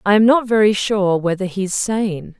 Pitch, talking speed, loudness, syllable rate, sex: 200 Hz, 200 wpm, -17 LUFS, 4.4 syllables/s, female